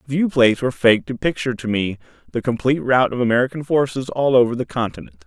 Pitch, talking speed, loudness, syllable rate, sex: 125 Hz, 195 wpm, -19 LUFS, 6.6 syllables/s, male